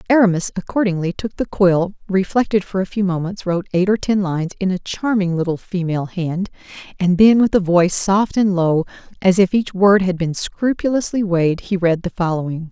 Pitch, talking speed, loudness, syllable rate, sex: 185 Hz, 195 wpm, -18 LUFS, 5.5 syllables/s, female